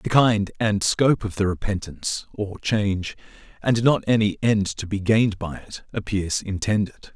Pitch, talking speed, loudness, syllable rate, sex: 105 Hz, 170 wpm, -23 LUFS, 4.8 syllables/s, male